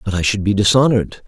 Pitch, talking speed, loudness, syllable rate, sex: 105 Hz, 235 wpm, -15 LUFS, 6.9 syllables/s, male